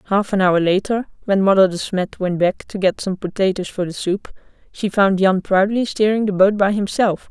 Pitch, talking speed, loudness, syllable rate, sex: 195 Hz, 215 wpm, -18 LUFS, 5.1 syllables/s, female